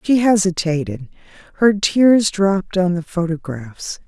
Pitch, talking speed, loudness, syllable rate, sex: 185 Hz, 120 wpm, -17 LUFS, 4.1 syllables/s, female